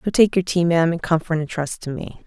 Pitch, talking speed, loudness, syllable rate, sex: 165 Hz, 290 wpm, -20 LUFS, 6.0 syllables/s, female